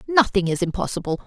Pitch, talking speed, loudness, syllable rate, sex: 195 Hz, 140 wpm, -22 LUFS, 6.3 syllables/s, female